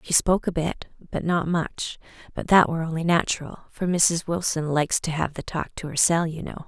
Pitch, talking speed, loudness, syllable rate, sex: 165 Hz, 215 wpm, -24 LUFS, 5.5 syllables/s, female